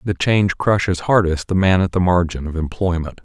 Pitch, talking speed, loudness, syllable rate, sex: 90 Hz, 205 wpm, -18 LUFS, 5.4 syllables/s, male